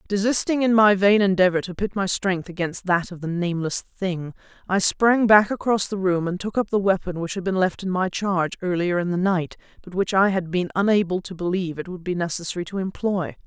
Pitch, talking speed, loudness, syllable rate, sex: 185 Hz, 225 wpm, -22 LUFS, 5.6 syllables/s, female